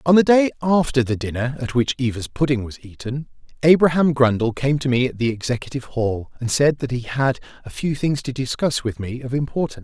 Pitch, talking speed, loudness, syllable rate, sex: 130 Hz, 215 wpm, -20 LUFS, 5.8 syllables/s, male